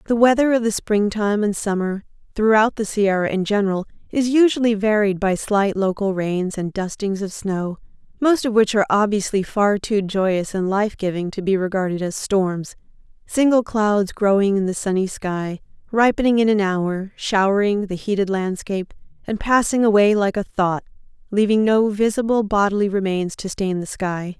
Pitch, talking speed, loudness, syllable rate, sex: 205 Hz, 165 wpm, -20 LUFS, 4.9 syllables/s, female